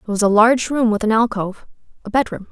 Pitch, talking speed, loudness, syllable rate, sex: 220 Hz, 215 wpm, -17 LUFS, 6.7 syllables/s, female